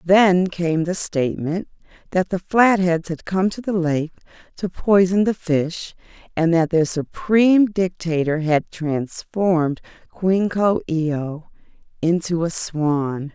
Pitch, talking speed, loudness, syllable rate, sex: 175 Hz, 135 wpm, -20 LUFS, 3.8 syllables/s, female